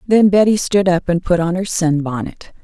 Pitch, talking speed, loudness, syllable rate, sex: 180 Hz, 205 wpm, -16 LUFS, 5.0 syllables/s, female